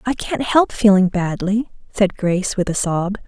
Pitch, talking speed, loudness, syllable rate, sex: 200 Hz, 185 wpm, -18 LUFS, 4.5 syllables/s, female